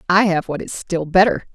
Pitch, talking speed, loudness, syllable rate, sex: 180 Hz, 235 wpm, -18 LUFS, 5.3 syllables/s, female